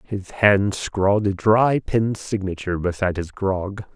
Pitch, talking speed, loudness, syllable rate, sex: 100 Hz, 150 wpm, -21 LUFS, 4.2 syllables/s, male